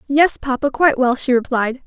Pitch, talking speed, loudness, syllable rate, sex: 265 Hz, 195 wpm, -17 LUFS, 5.4 syllables/s, female